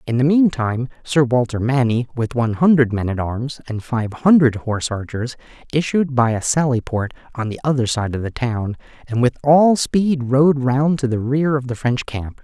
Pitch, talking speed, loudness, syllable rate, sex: 130 Hz, 205 wpm, -18 LUFS, 4.9 syllables/s, male